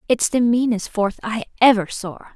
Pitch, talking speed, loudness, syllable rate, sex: 225 Hz, 180 wpm, -19 LUFS, 4.7 syllables/s, female